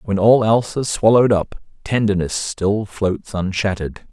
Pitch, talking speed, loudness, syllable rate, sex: 105 Hz, 145 wpm, -18 LUFS, 4.8 syllables/s, male